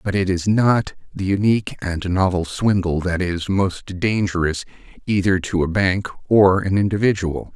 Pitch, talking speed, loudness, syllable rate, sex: 95 Hz, 160 wpm, -19 LUFS, 4.5 syllables/s, male